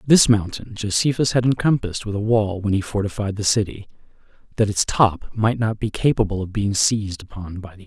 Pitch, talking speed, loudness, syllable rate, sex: 105 Hz, 205 wpm, -20 LUFS, 6.0 syllables/s, male